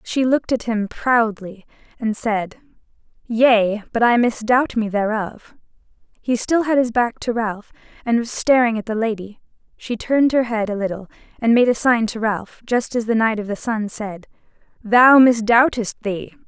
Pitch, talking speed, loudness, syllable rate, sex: 230 Hz, 180 wpm, -18 LUFS, 4.6 syllables/s, female